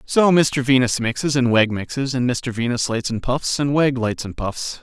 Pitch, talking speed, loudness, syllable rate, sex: 125 Hz, 225 wpm, -19 LUFS, 4.7 syllables/s, male